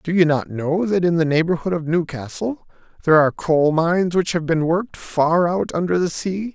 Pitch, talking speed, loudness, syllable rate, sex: 170 Hz, 210 wpm, -19 LUFS, 5.2 syllables/s, male